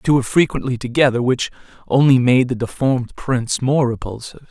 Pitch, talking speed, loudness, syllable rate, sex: 125 Hz, 175 wpm, -17 LUFS, 6.1 syllables/s, male